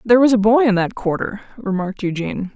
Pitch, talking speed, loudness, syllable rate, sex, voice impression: 210 Hz, 210 wpm, -18 LUFS, 6.5 syllables/s, female, feminine, adult-like, tensed, powerful, slightly bright, clear, fluent, intellectual, elegant, lively, slightly strict, sharp